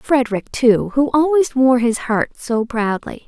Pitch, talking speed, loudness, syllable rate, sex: 250 Hz, 165 wpm, -17 LUFS, 4.2 syllables/s, female